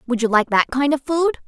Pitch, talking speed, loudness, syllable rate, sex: 265 Hz, 285 wpm, -18 LUFS, 5.4 syllables/s, female